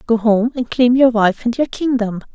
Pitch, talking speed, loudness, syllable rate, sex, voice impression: 235 Hz, 230 wpm, -16 LUFS, 4.9 syllables/s, female, very feminine, young, very thin, relaxed, very weak, slightly bright, very soft, slightly muffled, very fluent, slightly raspy, very cute, intellectual, refreshing, sincere, very calm, very friendly, very reassuring, very unique, very elegant, very sweet, slightly lively, very kind, very modest, very light